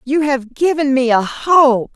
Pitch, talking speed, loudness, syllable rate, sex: 270 Hz, 185 wpm, -14 LUFS, 3.8 syllables/s, female